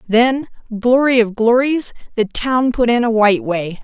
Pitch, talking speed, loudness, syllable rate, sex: 235 Hz, 170 wpm, -15 LUFS, 4.5 syllables/s, female